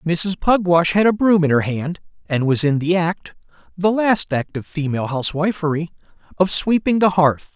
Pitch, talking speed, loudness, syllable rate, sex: 170 Hz, 185 wpm, -18 LUFS, 3.5 syllables/s, male